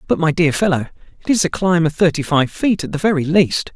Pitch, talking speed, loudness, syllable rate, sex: 165 Hz, 255 wpm, -17 LUFS, 5.9 syllables/s, male